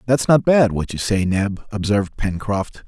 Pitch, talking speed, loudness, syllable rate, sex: 105 Hz, 190 wpm, -19 LUFS, 4.5 syllables/s, male